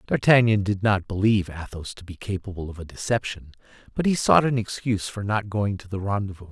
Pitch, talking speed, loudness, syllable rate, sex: 100 Hz, 200 wpm, -24 LUFS, 6.0 syllables/s, male